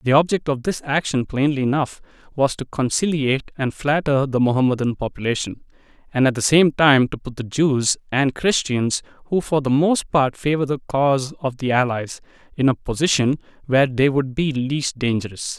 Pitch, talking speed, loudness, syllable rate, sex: 135 Hz, 175 wpm, -20 LUFS, 5.2 syllables/s, male